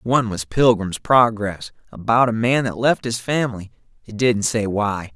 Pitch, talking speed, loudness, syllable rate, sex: 110 Hz, 175 wpm, -19 LUFS, 4.6 syllables/s, male